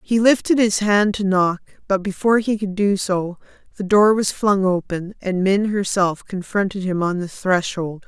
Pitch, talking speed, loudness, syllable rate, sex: 195 Hz, 185 wpm, -19 LUFS, 4.6 syllables/s, female